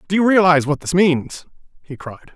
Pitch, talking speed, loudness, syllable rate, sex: 170 Hz, 205 wpm, -16 LUFS, 6.1 syllables/s, male